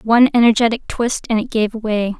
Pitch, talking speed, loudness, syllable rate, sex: 225 Hz, 190 wpm, -16 LUFS, 5.4 syllables/s, female